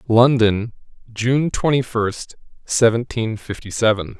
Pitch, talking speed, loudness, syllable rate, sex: 115 Hz, 100 wpm, -19 LUFS, 4.1 syllables/s, male